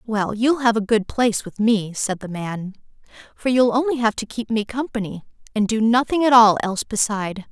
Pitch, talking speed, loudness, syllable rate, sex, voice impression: 220 Hz, 210 wpm, -20 LUFS, 5.3 syllables/s, female, feminine, adult-like, tensed, powerful, slightly bright, clear, fluent, intellectual, friendly, elegant, lively